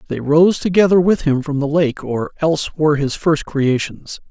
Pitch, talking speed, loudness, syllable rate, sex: 155 Hz, 195 wpm, -16 LUFS, 4.8 syllables/s, male